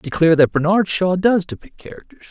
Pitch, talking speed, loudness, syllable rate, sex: 175 Hz, 180 wpm, -16 LUFS, 5.8 syllables/s, male